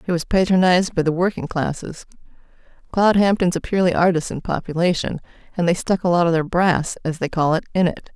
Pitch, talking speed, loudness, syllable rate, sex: 175 Hz, 175 wpm, -19 LUFS, 6.1 syllables/s, female